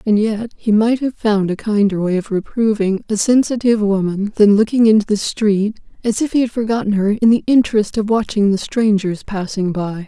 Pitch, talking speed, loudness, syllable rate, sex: 210 Hz, 195 wpm, -16 LUFS, 5.3 syllables/s, female